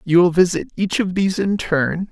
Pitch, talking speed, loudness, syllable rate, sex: 180 Hz, 225 wpm, -18 LUFS, 5.2 syllables/s, male